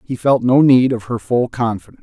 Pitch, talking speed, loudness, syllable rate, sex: 120 Hz, 235 wpm, -15 LUFS, 5.7 syllables/s, male